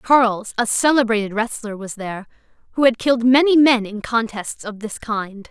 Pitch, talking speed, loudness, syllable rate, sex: 230 Hz, 175 wpm, -18 LUFS, 5.2 syllables/s, female